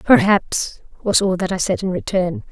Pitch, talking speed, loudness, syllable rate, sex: 185 Hz, 190 wpm, -19 LUFS, 4.6 syllables/s, female